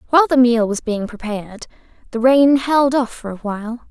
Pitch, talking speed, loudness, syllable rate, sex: 240 Hz, 200 wpm, -17 LUFS, 5.4 syllables/s, female